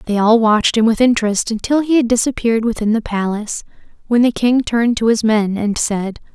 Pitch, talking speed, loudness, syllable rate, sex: 225 Hz, 210 wpm, -15 LUFS, 5.8 syllables/s, female